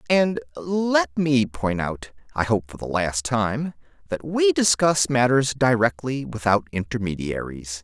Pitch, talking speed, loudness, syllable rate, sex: 125 Hz, 140 wpm, -22 LUFS, 4.0 syllables/s, male